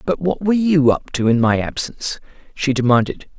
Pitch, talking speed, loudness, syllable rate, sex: 145 Hz, 195 wpm, -18 LUFS, 5.5 syllables/s, male